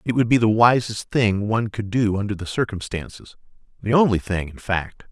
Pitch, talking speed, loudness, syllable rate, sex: 105 Hz, 200 wpm, -21 LUFS, 5.3 syllables/s, male